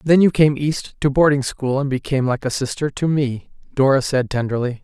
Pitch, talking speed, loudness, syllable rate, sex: 135 Hz, 210 wpm, -19 LUFS, 5.4 syllables/s, male